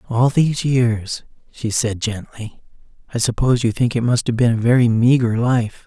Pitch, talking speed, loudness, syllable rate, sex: 120 Hz, 185 wpm, -18 LUFS, 4.9 syllables/s, male